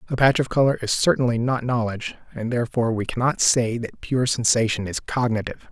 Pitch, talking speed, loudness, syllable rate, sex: 120 Hz, 190 wpm, -22 LUFS, 6.0 syllables/s, male